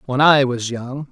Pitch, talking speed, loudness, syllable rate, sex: 130 Hz, 215 wpm, -16 LUFS, 4.1 syllables/s, male